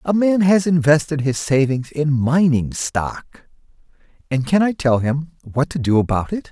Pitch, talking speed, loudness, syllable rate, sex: 145 Hz, 175 wpm, -18 LUFS, 4.4 syllables/s, male